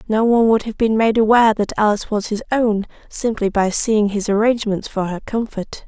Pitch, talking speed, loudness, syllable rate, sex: 215 Hz, 205 wpm, -17 LUFS, 5.6 syllables/s, female